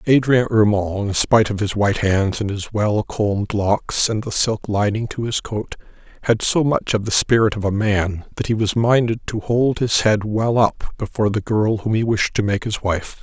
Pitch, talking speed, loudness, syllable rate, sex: 105 Hz, 220 wpm, -19 LUFS, 4.8 syllables/s, male